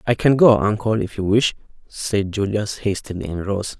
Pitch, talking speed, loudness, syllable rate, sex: 105 Hz, 190 wpm, -20 LUFS, 4.8 syllables/s, male